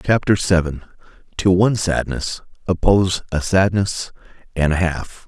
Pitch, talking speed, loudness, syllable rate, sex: 90 Hz, 115 wpm, -19 LUFS, 4.6 syllables/s, male